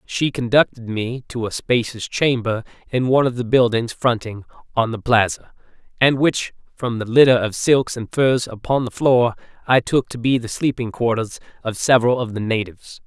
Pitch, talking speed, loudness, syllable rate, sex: 120 Hz, 185 wpm, -19 LUFS, 5.0 syllables/s, male